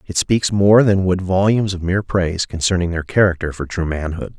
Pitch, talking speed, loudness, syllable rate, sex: 90 Hz, 205 wpm, -17 LUFS, 5.7 syllables/s, male